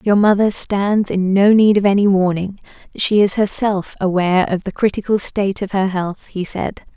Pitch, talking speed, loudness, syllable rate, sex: 195 Hz, 190 wpm, -16 LUFS, 4.9 syllables/s, female